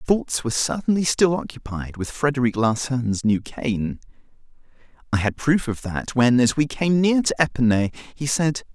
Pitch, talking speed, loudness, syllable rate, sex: 130 Hz, 170 wpm, -22 LUFS, 4.8 syllables/s, male